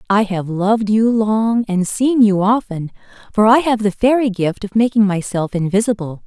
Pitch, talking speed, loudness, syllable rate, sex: 210 Hz, 180 wpm, -16 LUFS, 4.8 syllables/s, female